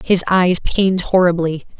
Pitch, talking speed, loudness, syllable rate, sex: 180 Hz, 135 wpm, -16 LUFS, 4.6 syllables/s, female